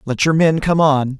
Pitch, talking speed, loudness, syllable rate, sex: 150 Hz, 250 wpm, -15 LUFS, 4.6 syllables/s, male